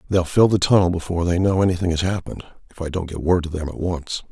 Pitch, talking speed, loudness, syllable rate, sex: 90 Hz, 265 wpm, -20 LUFS, 6.6 syllables/s, male